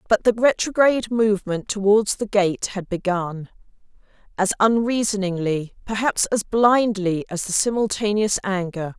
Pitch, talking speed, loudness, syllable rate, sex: 205 Hz, 115 wpm, -21 LUFS, 4.6 syllables/s, female